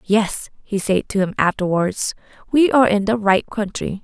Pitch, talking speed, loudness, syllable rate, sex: 205 Hz, 180 wpm, -19 LUFS, 4.8 syllables/s, female